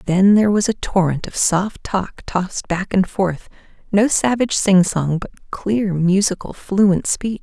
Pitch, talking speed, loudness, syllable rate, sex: 195 Hz, 170 wpm, -18 LUFS, 4.0 syllables/s, female